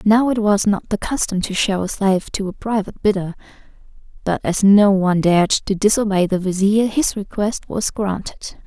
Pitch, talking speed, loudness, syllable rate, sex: 200 Hz, 185 wpm, -18 LUFS, 5.1 syllables/s, female